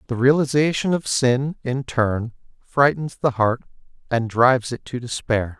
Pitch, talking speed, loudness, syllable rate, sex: 130 Hz, 150 wpm, -21 LUFS, 4.4 syllables/s, male